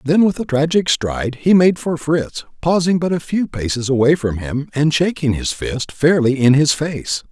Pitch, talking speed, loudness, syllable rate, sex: 150 Hz, 205 wpm, -17 LUFS, 4.6 syllables/s, male